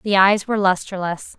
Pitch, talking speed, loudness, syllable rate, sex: 195 Hz, 175 wpm, -19 LUFS, 5.4 syllables/s, female